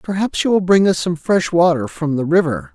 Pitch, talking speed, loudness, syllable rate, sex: 165 Hz, 240 wpm, -16 LUFS, 5.3 syllables/s, male